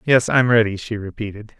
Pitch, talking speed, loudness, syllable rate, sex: 110 Hz, 190 wpm, -18 LUFS, 5.4 syllables/s, male